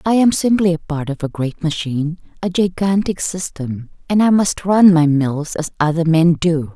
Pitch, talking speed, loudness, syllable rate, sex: 170 Hz, 185 wpm, -17 LUFS, 4.7 syllables/s, female